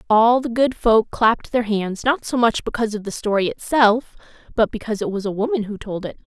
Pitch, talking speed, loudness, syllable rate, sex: 220 Hz, 230 wpm, -20 LUFS, 5.7 syllables/s, female